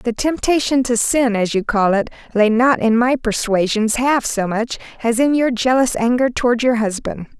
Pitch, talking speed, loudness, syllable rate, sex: 235 Hz, 195 wpm, -17 LUFS, 4.8 syllables/s, female